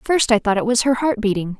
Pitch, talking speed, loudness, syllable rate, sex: 230 Hz, 300 wpm, -18 LUFS, 6.0 syllables/s, female